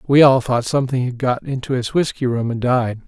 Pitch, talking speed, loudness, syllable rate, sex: 125 Hz, 235 wpm, -18 LUFS, 5.6 syllables/s, male